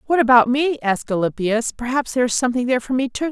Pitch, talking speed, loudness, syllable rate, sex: 250 Hz, 235 wpm, -19 LUFS, 7.0 syllables/s, female